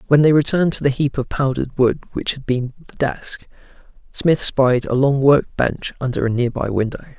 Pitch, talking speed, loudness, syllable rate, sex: 135 Hz, 200 wpm, -18 LUFS, 5.1 syllables/s, male